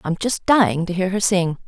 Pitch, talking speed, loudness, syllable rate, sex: 185 Hz, 250 wpm, -19 LUFS, 5.4 syllables/s, female